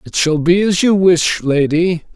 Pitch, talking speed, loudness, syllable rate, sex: 170 Hz, 195 wpm, -14 LUFS, 4.1 syllables/s, male